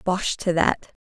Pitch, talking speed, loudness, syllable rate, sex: 180 Hz, 175 wpm, -22 LUFS, 3.8 syllables/s, female